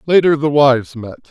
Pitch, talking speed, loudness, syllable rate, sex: 140 Hz, 185 wpm, -13 LUFS, 5.8 syllables/s, male